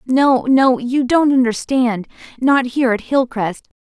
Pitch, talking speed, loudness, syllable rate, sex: 250 Hz, 140 wpm, -16 LUFS, 4.1 syllables/s, female